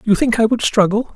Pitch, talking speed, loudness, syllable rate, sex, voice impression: 220 Hz, 260 wpm, -15 LUFS, 5.8 syllables/s, male, masculine, adult-like, slightly clear, refreshing, slightly friendly, slightly unique, slightly light